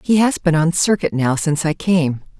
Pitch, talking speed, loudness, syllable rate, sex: 165 Hz, 225 wpm, -17 LUFS, 5.1 syllables/s, female